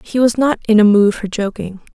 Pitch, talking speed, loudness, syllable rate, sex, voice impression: 215 Hz, 245 wpm, -14 LUFS, 5.4 syllables/s, female, feminine, adult-like, slightly muffled, calm, elegant, slightly sweet